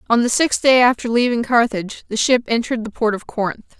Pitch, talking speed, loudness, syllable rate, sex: 230 Hz, 220 wpm, -17 LUFS, 6.1 syllables/s, female